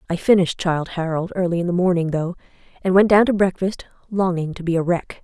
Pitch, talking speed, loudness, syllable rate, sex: 180 Hz, 220 wpm, -20 LUFS, 6.3 syllables/s, female